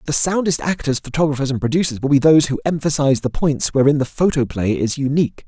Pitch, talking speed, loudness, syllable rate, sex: 145 Hz, 195 wpm, -18 LUFS, 6.5 syllables/s, male